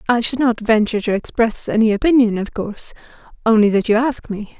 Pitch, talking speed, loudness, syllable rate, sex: 225 Hz, 185 wpm, -17 LUFS, 5.9 syllables/s, female